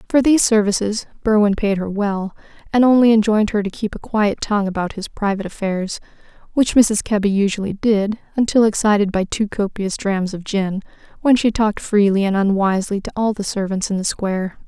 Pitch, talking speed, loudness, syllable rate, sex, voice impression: 205 Hz, 190 wpm, -18 LUFS, 5.7 syllables/s, female, feminine, adult-like, relaxed, slightly powerful, soft, fluent, intellectual, calm, slightly friendly, elegant, slightly sharp